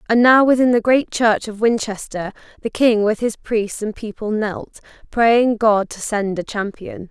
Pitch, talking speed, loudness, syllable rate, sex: 220 Hz, 185 wpm, -18 LUFS, 4.3 syllables/s, female